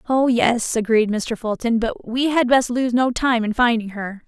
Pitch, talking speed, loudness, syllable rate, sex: 235 Hz, 210 wpm, -19 LUFS, 4.4 syllables/s, female